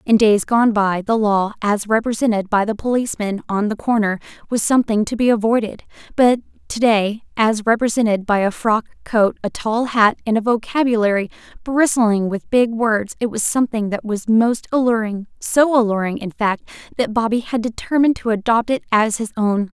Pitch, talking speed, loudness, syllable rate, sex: 220 Hz, 175 wpm, -18 LUFS, 5.1 syllables/s, female